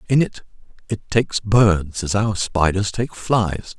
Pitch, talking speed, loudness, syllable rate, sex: 100 Hz, 160 wpm, -20 LUFS, 3.8 syllables/s, male